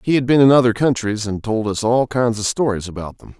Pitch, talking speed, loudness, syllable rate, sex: 115 Hz, 265 wpm, -17 LUFS, 5.8 syllables/s, male